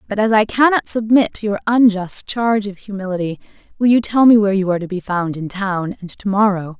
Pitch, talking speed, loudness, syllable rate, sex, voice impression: 205 Hz, 230 wpm, -16 LUFS, 5.9 syllables/s, female, feminine, adult-like, slightly clear, intellectual, slightly sharp